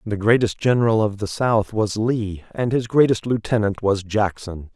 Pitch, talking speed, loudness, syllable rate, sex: 110 Hz, 175 wpm, -20 LUFS, 4.6 syllables/s, male